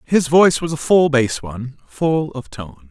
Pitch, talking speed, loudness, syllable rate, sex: 140 Hz, 205 wpm, -17 LUFS, 4.4 syllables/s, male